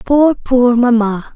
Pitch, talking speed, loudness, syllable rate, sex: 245 Hz, 135 wpm, -12 LUFS, 3.4 syllables/s, female